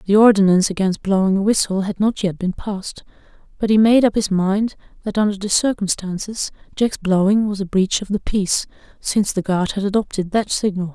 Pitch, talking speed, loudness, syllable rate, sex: 200 Hz, 195 wpm, -18 LUFS, 5.6 syllables/s, female